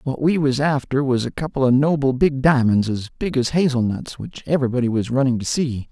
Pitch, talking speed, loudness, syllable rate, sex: 135 Hz, 225 wpm, -20 LUFS, 5.6 syllables/s, male